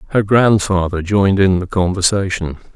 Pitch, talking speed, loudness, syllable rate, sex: 95 Hz, 130 wpm, -15 LUFS, 5.2 syllables/s, male